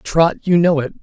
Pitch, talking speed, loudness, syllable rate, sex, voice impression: 160 Hz, 235 wpm, -15 LUFS, 4.6 syllables/s, male, masculine, adult-like, middle-aged, slightly thick, slightly tensed, slightly weak, bright, hard, slightly muffled, fluent, slightly raspy, slightly cool, intellectual, slightly refreshing, sincere, calm, mature, friendly, slightly reassuring, slightly unique, slightly elegant, slightly wild, slightly sweet, lively, kind, slightly modest